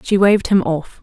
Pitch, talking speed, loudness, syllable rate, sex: 185 Hz, 235 wpm, -15 LUFS, 5.4 syllables/s, female